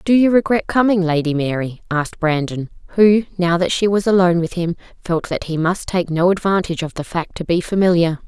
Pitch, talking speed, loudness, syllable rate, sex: 175 Hz, 210 wpm, -18 LUFS, 5.6 syllables/s, female